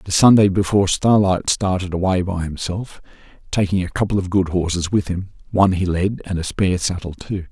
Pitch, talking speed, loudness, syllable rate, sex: 95 Hz, 185 wpm, -19 LUFS, 5.5 syllables/s, male